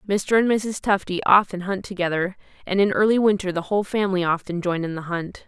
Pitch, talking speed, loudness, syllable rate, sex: 190 Hz, 210 wpm, -22 LUFS, 5.9 syllables/s, female